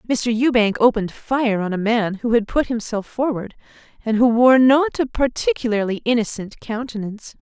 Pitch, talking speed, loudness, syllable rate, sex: 230 Hz, 160 wpm, -19 LUFS, 5.1 syllables/s, female